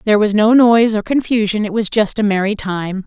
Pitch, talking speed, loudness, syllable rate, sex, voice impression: 210 Hz, 235 wpm, -14 LUFS, 5.8 syllables/s, female, very feminine, slightly young, slightly adult-like, thin, tensed, slightly powerful, bright, hard, very clear, fluent, slightly cool, intellectual, refreshing, slightly sincere, slightly calm, very unique, elegant, slightly sweet, slightly lively, strict, intense, very sharp